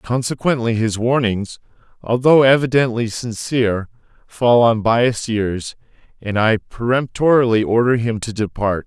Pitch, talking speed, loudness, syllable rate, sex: 115 Hz, 115 wpm, -17 LUFS, 4.5 syllables/s, male